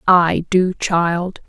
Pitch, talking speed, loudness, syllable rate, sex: 175 Hz, 120 wpm, -17 LUFS, 2.4 syllables/s, female